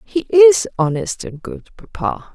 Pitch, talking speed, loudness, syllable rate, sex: 245 Hz, 155 wpm, -16 LUFS, 3.8 syllables/s, female